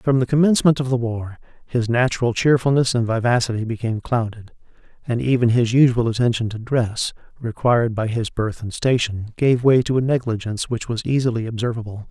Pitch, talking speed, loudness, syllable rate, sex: 120 Hz, 175 wpm, -20 LUFS, 5.7 syllables/s, male